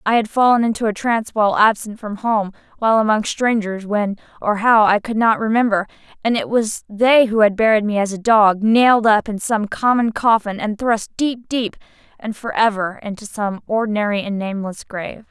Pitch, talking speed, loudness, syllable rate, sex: 215 Hz, 175 wpm, -17 LUFS, 5.2 syllables/s, female